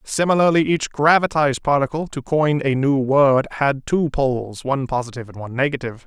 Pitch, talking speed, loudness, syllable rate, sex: 140 Hz, 170 wpm, -19 LUFS, 5.9 syllables/s, male